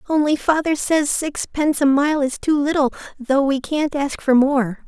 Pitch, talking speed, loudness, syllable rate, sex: 285 Hz, 185 wpm, -19 LUFS, 4.6 syllables/s, female